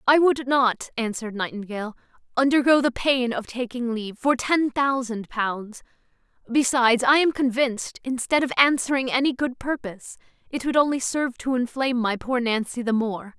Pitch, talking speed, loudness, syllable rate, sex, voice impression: 250 Hz, 160 wpm, -23 LUFS, 5.2 syllables/s, female, very feminine, young, very thin, very tensed, powerful, slightly soft, very clear, very fluent, cute, intellectual, very refreshing, sincere, calm, friendly, reassuring, unique, slightly elegant, wild, sweet, very lively, strict, intense, slightly sharp, light